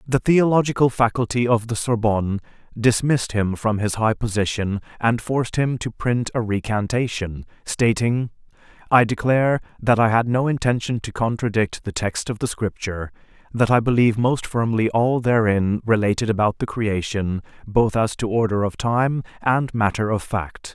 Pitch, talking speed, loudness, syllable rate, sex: 115 Hz, 160 wpm, -21 LUFS, 4.9 syllables/s, male